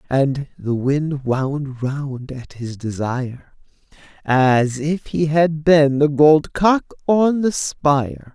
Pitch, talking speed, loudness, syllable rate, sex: 145 Hz, 135 wpm, -18 LUFS, 3.0 syllables/s, male